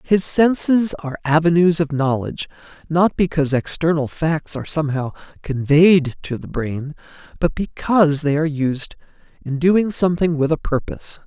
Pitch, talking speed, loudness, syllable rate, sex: 155 Hz, 145 wpm, -18 LUFS, 5.1 syllables/s, male